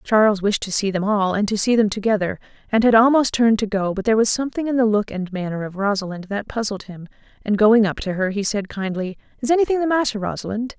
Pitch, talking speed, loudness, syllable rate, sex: 215 Hz, 245 wpm, -20 LUFS, 6.3 syllables/s, female